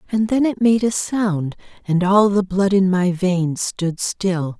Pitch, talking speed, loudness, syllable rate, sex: 195 Hz, 195 wpm, -18 LUFS, 3.7 syllables/s, female